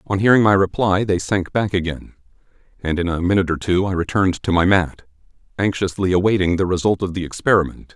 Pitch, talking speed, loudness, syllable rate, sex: 95 Hz, 195 wpm, -18 LUFS, 6.2 syllables/s, male